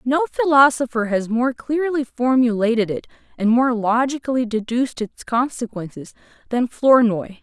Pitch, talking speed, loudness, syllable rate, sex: 245 Hz, 120 wpm, -19 LUFS, 4.8 syllables/s, female